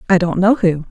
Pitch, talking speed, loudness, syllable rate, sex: 180 Hz, 265 wpm, -15 LUFS, 5.8 syllables/s, female